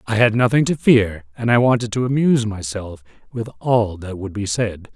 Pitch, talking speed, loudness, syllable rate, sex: 110 Hz, 205 wpm, -19 LUFS, 5.2 syllables/s, male